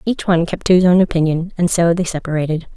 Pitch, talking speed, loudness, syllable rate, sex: 170 Hz, 240 wpm, -16 LUFS, 6.6 syllables/s, female